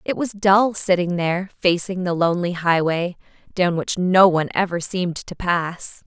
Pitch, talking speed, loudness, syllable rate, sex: 180 Hz, 165 wpm, -20 LUFS, 4.7 syllables/s, female